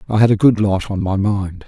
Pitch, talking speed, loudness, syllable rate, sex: 100 Hz, 285 wpm, -16 LUFS, 5.4 syllables/s, male